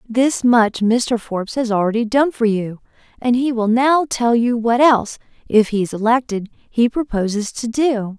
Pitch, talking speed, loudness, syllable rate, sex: 230 Hz, 185 wpm, -17 LUFS, 4.5 syllables/s, female